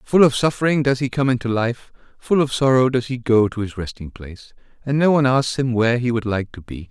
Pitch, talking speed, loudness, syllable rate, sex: 125 Hz, 250 wpm, -19 LUFS, 5.9 syllables/s, male